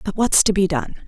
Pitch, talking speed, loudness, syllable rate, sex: 195 Hz, 280 wpm, -18 LUFS, 5.8 syllables/s, female